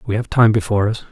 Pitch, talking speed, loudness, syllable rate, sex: 105 Hz, 270 wpm, -16 LUFS, 7.3 syllables/s, male